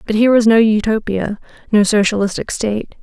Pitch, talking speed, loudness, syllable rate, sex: 215 Hz, 160 wpm, -15 LUFS, 5.9 syllables/s, female